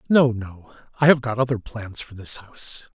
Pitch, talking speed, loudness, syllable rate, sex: 115 Hz, 205 wpm, -22 LUFS, 4.9 syllables/s, male